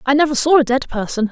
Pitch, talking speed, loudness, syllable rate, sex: 265 Hz, 275 wpm, -16 LUFS, 6.7 syllables/s, female